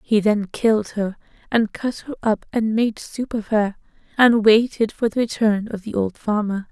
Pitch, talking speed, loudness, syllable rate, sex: 215 Hz, 195 wpm, -20 LUFS, 4.5 syllables/s, female